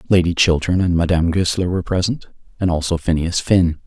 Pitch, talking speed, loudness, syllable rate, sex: 85 Hz, 170 wpm, -18 LUFS, 5.9 syllables/s, male